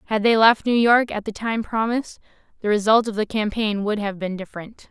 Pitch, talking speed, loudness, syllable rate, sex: 215 Hz, 220 wpm, -20 LUFS, 5.6 syllables/s, female